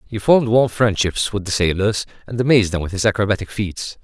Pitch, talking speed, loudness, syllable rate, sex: 105 Hz, 210 wpm, -18 LUFS, 6.0 syllables/s, male